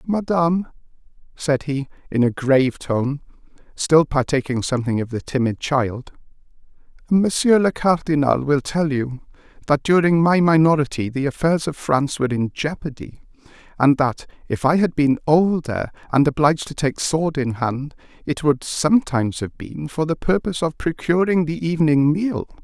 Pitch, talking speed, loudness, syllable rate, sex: 150 Hz, 150 wpm, -20 LUFS, 4.9 syllables/s, male